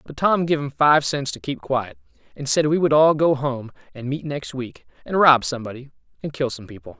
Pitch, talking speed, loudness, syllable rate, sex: 135 Hz, 230 wpm, -20 LUFS, 5.4 syllables/s, male